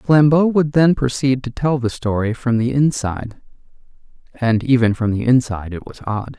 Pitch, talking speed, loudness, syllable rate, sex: 125 Hz, 180 wpm, -17 LUFS, 5.0 syllables/s, male